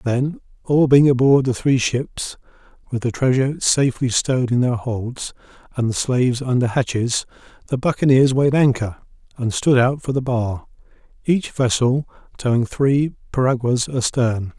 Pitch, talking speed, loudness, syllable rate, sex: 125 Hz, 150 wpm, -19 LUFS, 4.7 syllables/s, male